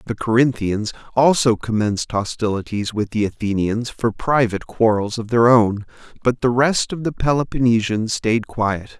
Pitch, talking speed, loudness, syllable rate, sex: 115 Hz, 145 wpm, -19 LUFS, 4.7 syllables/s, male